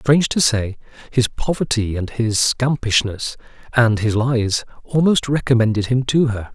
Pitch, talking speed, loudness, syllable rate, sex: 120 Hz, 145 wpm, -18 LUFS, 4.5 syllables/s, male